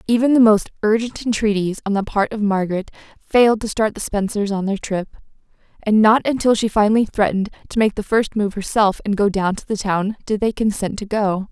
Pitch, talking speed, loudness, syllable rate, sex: 210 Hz, 215 wpm, -18 LUFS, 5.7 syllables/s, female